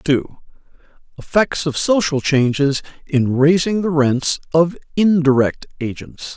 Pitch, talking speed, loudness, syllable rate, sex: 155 Hz, 115 wpm, -17 LUFS, 3.9 syllables/s, male